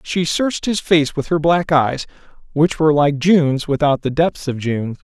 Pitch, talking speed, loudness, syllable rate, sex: 150 Hz, 200 wpm, -17 LUFS, 5.0 syllables/s, male